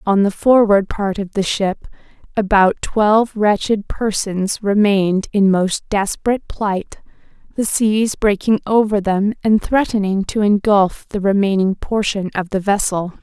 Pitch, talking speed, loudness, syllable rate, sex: 205 Hz, 140 wpm, -17 LUFS, 4.3 syllables/s, female